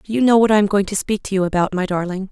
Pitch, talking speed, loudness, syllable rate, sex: 200 Hz, 365 wpm, -17 LUFS, 7.4 syllables/s, female